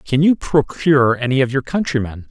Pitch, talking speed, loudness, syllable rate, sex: 135 Hz, 180 wpm, -17 LUFS, 5.3 syllables/s, male